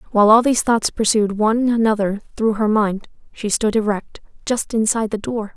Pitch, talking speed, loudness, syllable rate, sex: 215 Hz, 185 wpm, -18 LUFS, 5.5 syllables/s, female